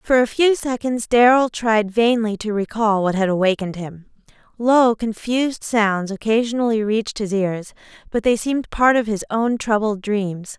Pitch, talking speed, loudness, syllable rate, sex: 220 Hz, 165 wpm, -19 LUFS, 4.7 syllables/s, female